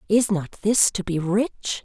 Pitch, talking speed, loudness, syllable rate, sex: 200 Hz, 195 wpm, -22 LUFS, 3.8 syllables/s, female